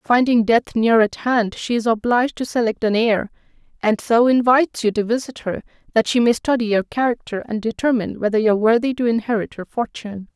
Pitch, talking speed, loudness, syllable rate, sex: 230 Hz, 205 wpm, -19 LUFS, 5.9 syllables/s, female